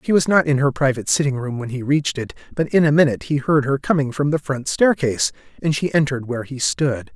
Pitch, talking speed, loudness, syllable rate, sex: 140 Hz, 250 wpm, -19 LUFS, 6.4 syllables/s, male